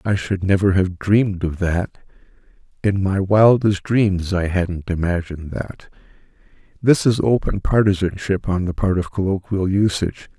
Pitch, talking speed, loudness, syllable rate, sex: 95 Hz, 145 wpm, -19 LUFS, 4.6 syllables/s, male